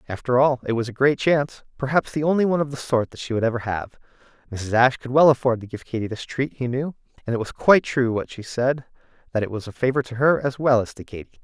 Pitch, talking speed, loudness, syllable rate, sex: 125 Hz, 260 wpm, -22 LUFS, 6.6 syllables/s, male